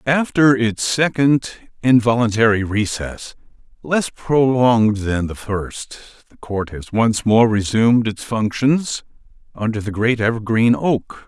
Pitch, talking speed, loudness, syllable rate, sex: 115 Hz, 110 wpm, -18 LUFS, 3.9 syllables/s, male